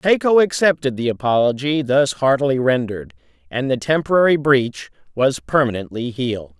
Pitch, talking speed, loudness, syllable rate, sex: 135 Hz, 125 wpm, -18 LUFS, 5.3 syllables/s, male